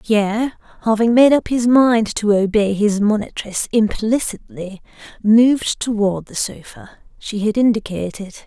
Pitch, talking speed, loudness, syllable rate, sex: 215 Hz, 130 wpm, -17 LUFS, 4.4 syllables/s, female